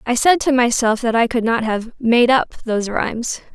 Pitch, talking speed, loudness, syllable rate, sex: 235 Hz, 220 wpm, -17 LUFS, 4.9 syllables/s, female